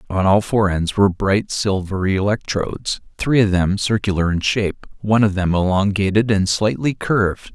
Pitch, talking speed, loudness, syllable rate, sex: 100 Hz, 165 wpm, -18 LUFS, 5.1 syllables/s, male